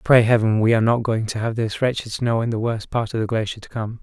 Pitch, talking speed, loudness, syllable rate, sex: 115 Hz, 300 wpm, -21 LUFS, 6.1 syllables/s, male